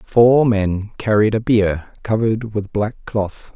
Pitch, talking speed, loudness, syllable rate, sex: 105 Hz, 150 wpm, -18 LUFS, 3.7 syllables/s, male